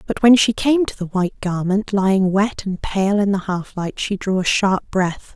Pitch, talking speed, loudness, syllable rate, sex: 195 Hz, 235 wpm, -19 LUFS, 4.7 syllables/s, female